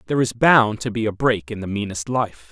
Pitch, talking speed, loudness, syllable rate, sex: 110 Hz, 265 wpm, -20 LUFS, 5.6 syllables/s, male